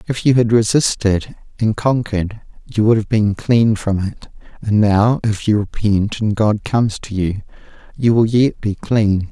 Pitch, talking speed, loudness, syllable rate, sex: 110 Hz, 180 wpm, -17 LUFS, 4.4 syllables/s, male